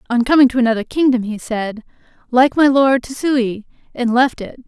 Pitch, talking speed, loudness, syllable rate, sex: 250 Hz, 180 wpm, -16 LUFS, 4.9 syllables/s, female